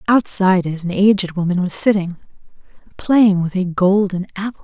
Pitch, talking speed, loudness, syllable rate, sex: 190 Hz, 155 wpm, -16 LUFS, 5.3 syllables/s, female